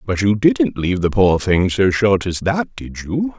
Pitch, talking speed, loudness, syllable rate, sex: 110 Hz, 230 wpm, -17 LUFS, 4.3 syllables/s, male